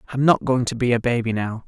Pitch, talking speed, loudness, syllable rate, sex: 120 Hz, 285 wpm, -20 LUFS, 6.5 syllables/s, male